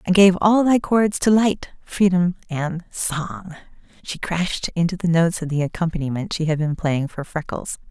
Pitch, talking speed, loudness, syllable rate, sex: 175 Hz, 180 wpm, -20 LUFS, 2.0 syllables/s, female